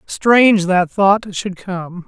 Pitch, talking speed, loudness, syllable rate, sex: 190 Hz, 145 wpm, -14 LUFS, 3.1 syllables/s, male